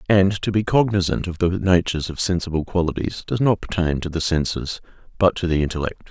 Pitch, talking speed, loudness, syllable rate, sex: 90 Hz, 195 wpm, -21 LUFS, 5.8 syllables/s, male